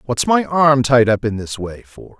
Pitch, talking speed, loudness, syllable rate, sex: 125 Hz, 245 wpm, -15 LUFS, 4.5 syllables/s, male